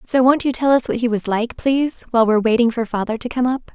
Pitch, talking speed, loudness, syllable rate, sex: 240 Hz, 290 wpm, -18 LUFS, 6.5 syllables/s, female